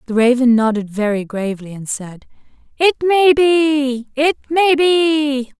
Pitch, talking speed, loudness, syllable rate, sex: 270 Hz, 130 wpm, -15 LUFS, 3.9 syllables/s, female